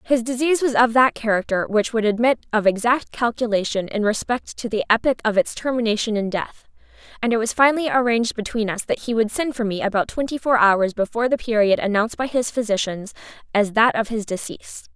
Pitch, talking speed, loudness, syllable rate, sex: 225 Hz, 205 wpm, -20 LUFS, 6.0 syllables/s, female